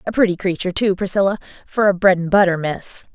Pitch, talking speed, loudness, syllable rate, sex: 190 Hz, 210 wpm, -18 LUFS, 6.3 syllables/s, female